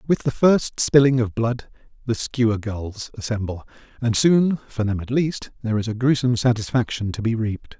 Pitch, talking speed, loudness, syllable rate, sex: 120 Hz, 185 wpm, -21 LUFS, 5.1 syllables/s, male